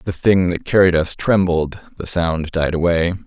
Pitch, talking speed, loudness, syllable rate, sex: 85 Hz, 165 wpm, -17 LUFS, 4.6 syllables/s, male